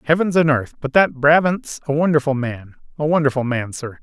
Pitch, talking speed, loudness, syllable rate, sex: 145 Hz, 180 wpm, -18 LUFS, 5.4 syllables/s, male